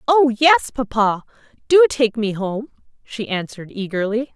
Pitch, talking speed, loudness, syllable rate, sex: 235 Hz, 140 wpm, -18 LUFS, 4.5 syllables/s, female